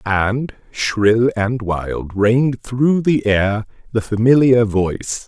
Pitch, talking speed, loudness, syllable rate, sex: 115 Hz, 125 wpm, -17 LUFS, 3.0 syllables/s, male